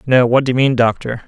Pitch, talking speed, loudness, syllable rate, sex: 125 Hz, 285 wpm, -14 LUFS, 6.1 syllables/s, male